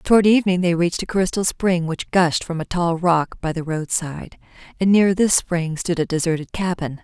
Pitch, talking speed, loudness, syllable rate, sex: 175 Hz, 205 wpm, -20 LUFS, 5.2 syllables/s, female